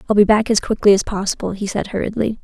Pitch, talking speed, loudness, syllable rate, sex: 205 Hz, 245 wpm, -17 LUFS, 6.7 syllables/s, female